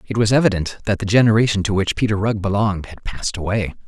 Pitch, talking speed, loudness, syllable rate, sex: 105 Hz, 215 wpm, -19 LUFS, 6.7 syllables/s, male